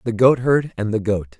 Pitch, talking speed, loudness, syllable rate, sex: 115 Hz, 215 wpm, -19 LUFS, 4.8 syllables/s, male